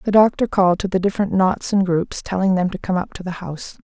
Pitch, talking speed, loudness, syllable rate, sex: 190 Hz, 265 wpm, -19 LUFS, 6.2 syllables/s, female